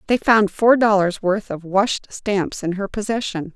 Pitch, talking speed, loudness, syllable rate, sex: 200 Hz, 185 wpm, -19 LUFS, 4.2 syllables/s, female